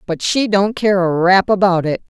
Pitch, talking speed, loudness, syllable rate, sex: 190 Hz, 220 wpm, -15 LUFS, 4.7 syllables/s, female